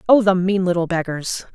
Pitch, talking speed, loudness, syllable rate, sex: 185 Hz, 195 wpm, -19 LUFS, 5.2 syllables/s, female